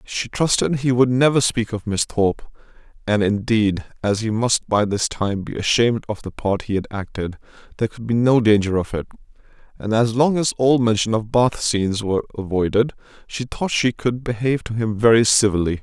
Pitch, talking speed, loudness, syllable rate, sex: 110 Hz, 195 wpm, -20 LUFS, 5.3 syllables/s, male